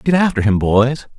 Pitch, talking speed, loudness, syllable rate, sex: 130 Hz, 200 wpm, -15 LUFS, 4.6 syllables/s, male